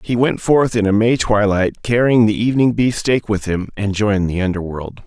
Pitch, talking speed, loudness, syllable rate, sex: 110 Hz, 200 wpm, -16 LUFS, 5.2 syllables/s, male